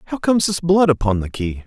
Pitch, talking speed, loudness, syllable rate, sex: 150 Hz, 250 wpm, -18 LUFS, 6.3 syllables/s, male